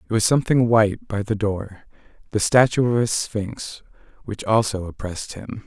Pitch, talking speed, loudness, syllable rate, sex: 110 Hz, 160 wpm, -21 LUFS, 4.9 syllables/s, male